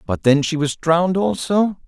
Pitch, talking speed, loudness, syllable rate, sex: 170 Hz, 190 wpm, -18 LUFS, 4.7 syllables/s, male